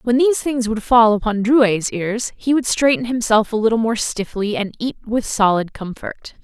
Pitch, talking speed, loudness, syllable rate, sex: 225 Hz, 195 wpm, -18 LUFS, 4.7 syllables/s, female